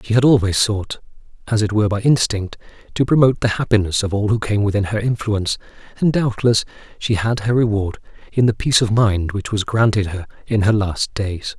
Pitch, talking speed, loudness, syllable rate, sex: 105 Hz, 200 wpm, -18 LUFS, 5.6 syllables/s, male